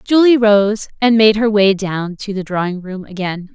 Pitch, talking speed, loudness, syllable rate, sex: 205 Hz, 205 wpm, -15 LUFS, 4.6 syllables/s, female